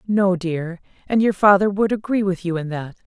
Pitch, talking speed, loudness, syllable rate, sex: 190 Hz, 210 wpm, -19 LUFS, 5.0 syllables/s, female